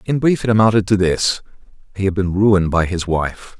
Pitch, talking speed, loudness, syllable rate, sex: 100 Hz, 200 wpm, -17 LUFS, 5.4 syllables/s, male